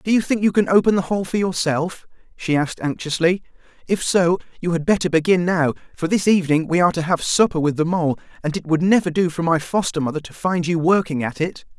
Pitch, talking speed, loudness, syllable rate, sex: 170 Hz, 235 wpm, -20 LUFS, 6.0 syllables/s, male